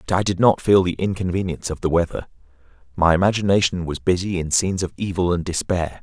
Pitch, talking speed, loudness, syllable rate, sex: 90 Hz, 200 wpm, -20 LUFS, 6.4 syllables/s, male